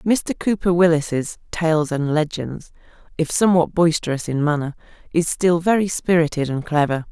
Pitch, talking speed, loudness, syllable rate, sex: 160 Hz, 145 wpm, -20 LUFS, 4.8 syllables/s, female